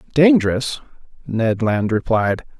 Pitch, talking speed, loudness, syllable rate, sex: 120 Hz, 95 wpm, -18 LUFS, 4.0 syllables/s, male